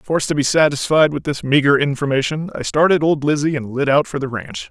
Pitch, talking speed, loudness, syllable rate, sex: 145 Hz, 230 wpm, -17 LUFS, 5.9 syllables/s, male